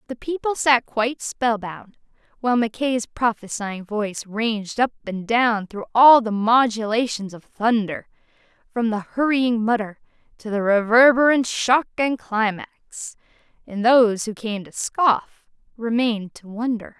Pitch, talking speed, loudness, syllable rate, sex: 225 Hz, 140 wpm, -20 LUFS, 4.3 syllables/s, female